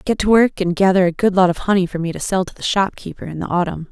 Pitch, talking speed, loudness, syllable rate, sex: 185 Hz, 305 wpm, -17 LUFS, 6.6 syllables/s, female